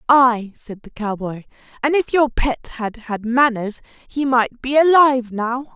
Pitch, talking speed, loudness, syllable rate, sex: 245 Hz, 165 wpm, -18 LUFS, 4.1 syllables/s, female